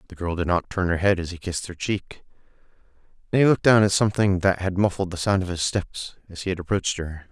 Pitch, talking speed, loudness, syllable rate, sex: 95 Hz, 255 wpm, -23 LUFS, 6.4 syllables/s, male